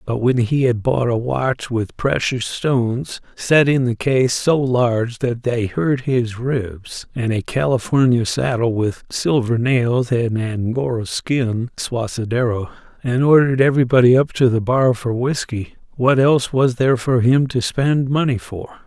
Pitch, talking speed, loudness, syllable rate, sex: 125 Hz, 160 wpm, -18 LUFS, 4.1 syllables/s, male